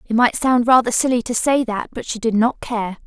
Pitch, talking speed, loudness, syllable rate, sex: 235 Hz, 255 wpm, -18 LUFS, 5.2 syllables/s, female